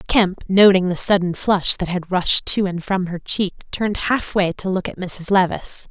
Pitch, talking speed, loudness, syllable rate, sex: 185 Hz, 205 wpm, -18 LUFS, 4.6 syllables/s, female